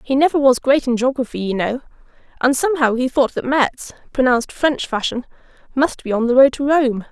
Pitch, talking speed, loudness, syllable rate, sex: 260 Hz, 205 wpm, -17 LUFS, 5.6 syllables/s, female